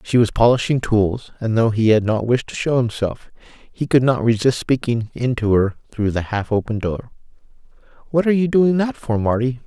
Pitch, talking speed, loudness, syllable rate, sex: 120 Hz, 205 wpm, -19 LUFS, 5.1 syllables/s, male